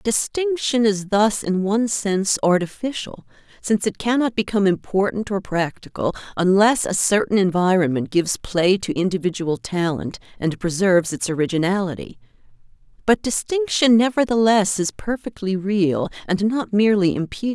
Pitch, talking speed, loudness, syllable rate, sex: 200 Hz, 125 wpm, -20 LUFS, 5.1 syllables/s, female